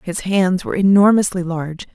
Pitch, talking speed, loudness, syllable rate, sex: 185 Hz, 155 wpm, -16 LUFS, 5.6 syllables/s, female